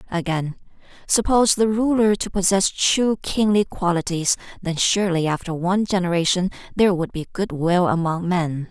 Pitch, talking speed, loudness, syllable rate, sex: 185 Hz, 145 wpm, -20 LUFS, 5.1 syllables/s, female